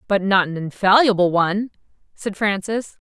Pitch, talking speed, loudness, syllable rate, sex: 200 Hz, 135 wpm, -19 LUFS, 5.0 syllables/s, female